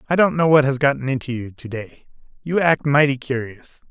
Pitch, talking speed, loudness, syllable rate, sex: 140 Hz, 215 wpm, -19 LUFS, 5.2 syllables/s, male